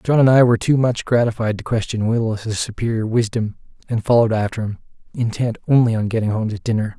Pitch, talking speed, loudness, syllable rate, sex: 115 Hz, 200 wpm, -19 LUFS, 6.1 syllables/s, male